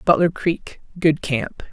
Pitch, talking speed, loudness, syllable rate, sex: 160 Hz, 105 wpm, -21 LUFS, 3.6 syllables/s, female